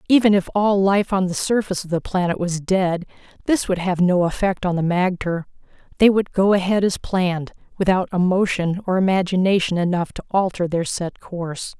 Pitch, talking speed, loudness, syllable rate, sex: 185 Hz, 185 wpm, -20 LUFS, 5.3 syllables/s, female